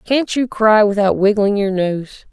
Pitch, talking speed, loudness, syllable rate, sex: 210 Hz, 180 wpm, -15 LUFS, 4.1 syllables/s, female